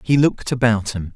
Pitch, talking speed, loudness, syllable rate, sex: 115 Hz, 205 wpm, -19 LUFS, 5.7 syllables/s, male